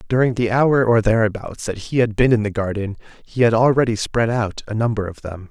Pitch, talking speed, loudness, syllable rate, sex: 110 Hz, 230 wpm, -19 LUFS, 5.6 syllables/s, male